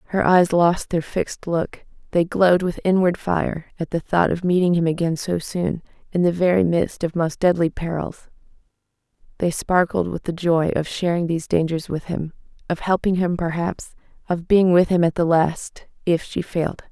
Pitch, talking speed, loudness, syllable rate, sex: 170 Hz, 175 wpm, -21 LUFS, 4.9 syllables/s, female